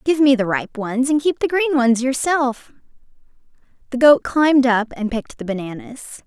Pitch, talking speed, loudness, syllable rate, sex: 255 Hz, 180 wpm, -18 LUFS, 5.2 syllables/s, female